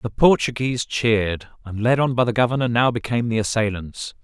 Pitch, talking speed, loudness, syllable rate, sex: 115 Hz, 185 wpm, -20 LUFS, 5.8 syllables/s, male